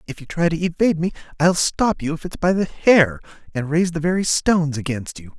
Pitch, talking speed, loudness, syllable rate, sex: 160 Hz, 235 wpm, -20 LUFS, 5.8 syllables/s, male